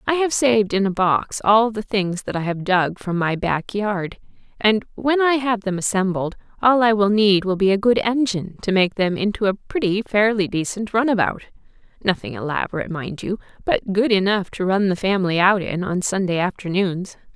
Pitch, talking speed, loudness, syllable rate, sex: 200 Hz, 195 wpm, -20 LUFS, 5.1 syllables/s, female